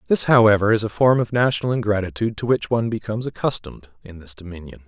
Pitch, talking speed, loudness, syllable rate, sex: 105 Hz, 195 wpm, -19 LUFS, 7.1 syllables/s, male